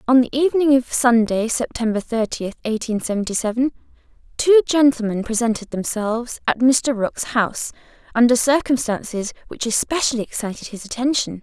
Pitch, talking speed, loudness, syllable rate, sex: 240 Hz, 130 wpm, -19 LUFS, 5.4 syllables/s, female